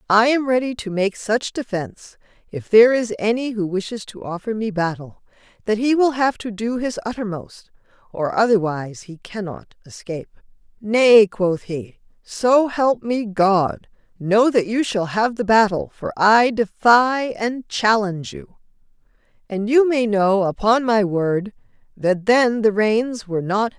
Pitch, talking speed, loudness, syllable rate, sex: 215 Hz, 165 wpm, -19 LUFS, 4.4 syllables/s, female